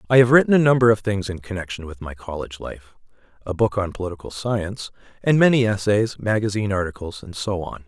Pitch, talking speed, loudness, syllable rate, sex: 100 Hz, 190 wpm, -21 LUFS, 6.4 syllables/s, male